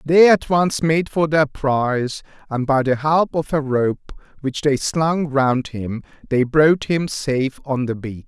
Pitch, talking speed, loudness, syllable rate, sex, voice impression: 145 Hz, 190 wpm, -19 LUFS, 3.8 syllables/s, male, masculine, middle-aged, tensed, slightly powerful, clear, slightly halting, intellectual, calm, friendly, wild, lively, slightly strict, slightly intense, sharp